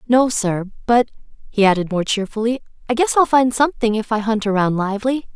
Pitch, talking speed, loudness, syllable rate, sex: 225 Hz, 190 wpm, -18 LUFS, 5.9 syllables/s, female